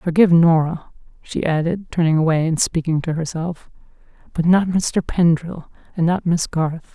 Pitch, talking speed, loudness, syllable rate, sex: 165 Hz, 165 wpm, -19 LUFS, 4.9 syllables/s, female